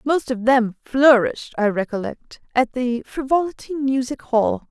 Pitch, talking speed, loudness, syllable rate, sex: 255 Hz, 140 wpm, -20 LUFS, 4.3 syllables/s, female